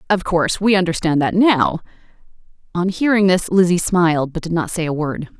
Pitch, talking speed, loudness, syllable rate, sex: 175 Hz, 190 wpm, -17 LUFS, 5.5 syllables/s, female